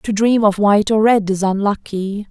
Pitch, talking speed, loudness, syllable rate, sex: 205 Hz, 210 wpm, -16 LUFS, 4.9 syllables/s, female